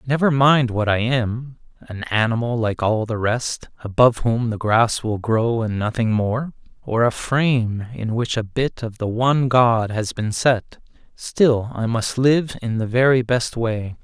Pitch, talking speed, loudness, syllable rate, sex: 120 Hz, 175 wpm, -20 LUFS, 4.1 syllables/s, male